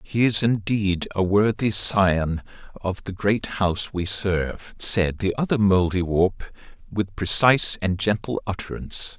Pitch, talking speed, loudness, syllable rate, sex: 100 Hz, 135 wpm, -23 LUFS, 4.2 syllables/s, male